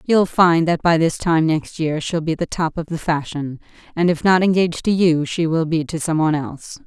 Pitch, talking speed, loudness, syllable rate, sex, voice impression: 165 Hz, 245 wpm, -18 LUFS, 5.2 syllables/s, female, feminine, middle-aged, tensed, slightly weak, slightly dark, clear, fluent, intellectual, calm, reassuring, elegant, lively, slightly strict